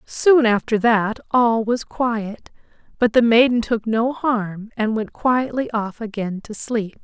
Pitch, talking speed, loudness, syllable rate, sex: 225 Hz, 160 wpm, -19 LUFS, 3.7 syllables/s, female